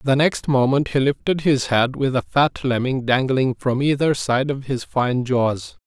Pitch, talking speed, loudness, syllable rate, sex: 130 Hz, 195 wpm, -20 LUFS, 4.2 syllables/s, male